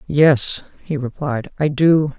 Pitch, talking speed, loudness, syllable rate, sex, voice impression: 145 Hz, 135 wpm, -18 LUFS, 3.3 syllables/s, female, feminine, adult-like, tensed, powerful, slightly dark, clear, slightly fluent, intellectual, calm, slightly reassuring, elegant, modest